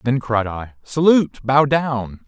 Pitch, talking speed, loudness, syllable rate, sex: 130 Hz, 160 wpm, -18 LUFS, 4.0 syllables/s, male